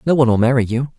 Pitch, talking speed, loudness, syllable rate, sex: 125 Hz, 305 wpm, -16 LUFS, 8.2 syllables/s, male